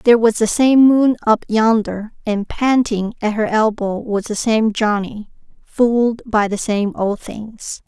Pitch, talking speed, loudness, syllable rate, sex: 220 Hz, 160 wpm, -16 LUFS, 3.9 syllables/s, female